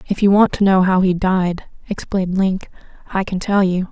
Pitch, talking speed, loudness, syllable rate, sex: 190 Hz, 215 wpm, -17 LUFS, 5.1 syllables/s, female